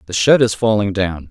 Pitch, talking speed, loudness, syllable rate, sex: 105 Hz, 230 wpm, -15 LUFS, 5.2 syllables/s, male